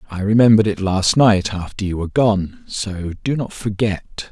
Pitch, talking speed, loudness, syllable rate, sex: 100 Hz, 180 wpm, -18 LUFS, 4.8 syllables/s, male